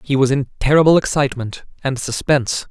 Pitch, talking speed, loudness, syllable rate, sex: 135 Hz, 155 wpm, -17 LUFS, 6.1 syllables/s, male